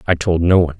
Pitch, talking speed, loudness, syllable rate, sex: 85 Hz, 305 wpm, -15 LUFS, 7.8 syllables/s, male